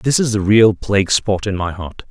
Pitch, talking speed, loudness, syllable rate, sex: 105 Hz, 255 wpm, -16 LUFS, 4.9 syllables/s, male